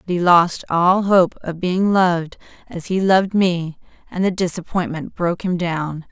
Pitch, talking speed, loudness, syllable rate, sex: 175 Hz, 175 wpm, -18 LUFS, 4.6 syllables/s, female